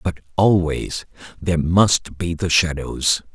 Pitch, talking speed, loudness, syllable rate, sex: 85 Hz, 125 wpm, -19 LUFS, 3.8 syllables/s, male